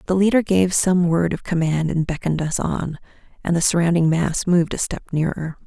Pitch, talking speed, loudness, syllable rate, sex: 170 Hz, 200 wpm, -20 LUFS, 5.5 syllables/s, female